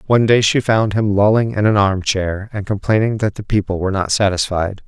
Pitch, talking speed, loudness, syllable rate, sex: 105 Hz, 220 wpm, -16 LUFS, 5.6 syllables/s, male